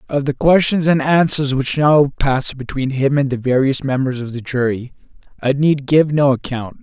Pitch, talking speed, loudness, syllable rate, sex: 135 Hz, 195 wpm, -16 LUFS, 4.9 syllables/s, male